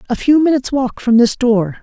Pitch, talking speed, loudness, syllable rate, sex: 245 Hz, 230 wpm, -14 LUFS, 5.6 syllables/s, female